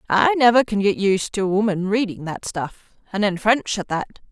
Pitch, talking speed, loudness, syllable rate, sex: 205 Hz, 210 wpm, -20 LUFS, 4.9 syllables/s, female